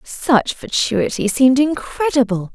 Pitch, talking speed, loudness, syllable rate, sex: 255 Hz, 95 wpm, -17 LUFS, 4.1 syllables/s, female